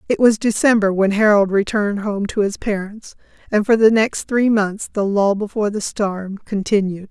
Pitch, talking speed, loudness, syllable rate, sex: 210 Hz, 185 wpm, -18 LUFS, 4.9 syllables/s, female